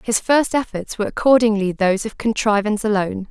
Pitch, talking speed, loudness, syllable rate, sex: 215 Hz, 165 wpm, -18 LUFS, 6.2 syllables/s, female